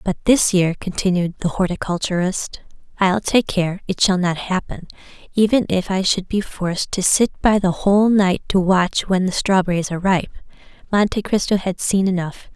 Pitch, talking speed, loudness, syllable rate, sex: 190 Hz, 175 wpm, -18 LUFS, 4.9 syllables/s, female